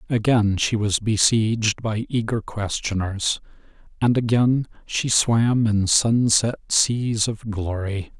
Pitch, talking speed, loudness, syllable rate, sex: 110 Hz, 115 wpm, -21 LUFS, 3.5 syllables/s, male